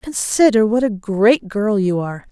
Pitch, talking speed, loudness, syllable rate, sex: 215 Hz, 180 wpm, -16 LUFS, 4.5 syllables/s, female